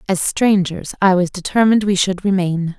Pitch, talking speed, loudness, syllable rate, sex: 190 Hz, 170 wpm, -16 LUFS, 5.0 syllables/s, female